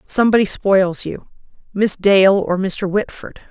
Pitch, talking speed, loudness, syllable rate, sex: 195 Hz, 135 wpm, -16 LUFS, 4.2 syllables/s, female